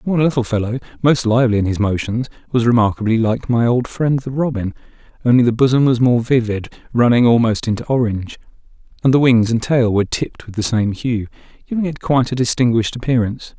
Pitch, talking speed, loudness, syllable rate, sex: 120 Hz, 190 wpm, -17 LUFS, 6.3 syllables/s, male